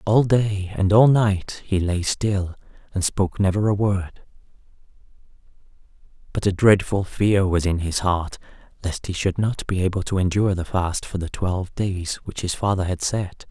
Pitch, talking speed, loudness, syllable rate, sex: 95 Hz, 180 wpm, -22 LUFS, 4.7 syllables/s, male